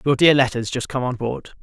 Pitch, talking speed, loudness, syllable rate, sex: 130 Hz, 260 wpm, -20 LUFS, 5.6 syllables/s, male